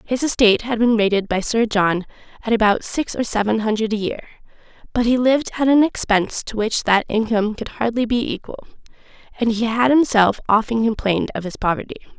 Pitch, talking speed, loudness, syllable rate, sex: 225 Hz, 190 wpm, -19 LUFS, 6.0 syllables/s, female